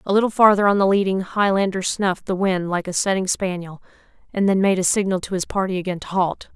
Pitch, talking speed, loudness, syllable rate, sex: 190 Hz, 230 wpm, -20 LUFS, 6.1 syllables/s, female